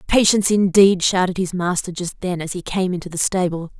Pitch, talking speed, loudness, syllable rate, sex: 180 Hz, 205 wpm, -19 LUFS, 5.6 syllables/s, female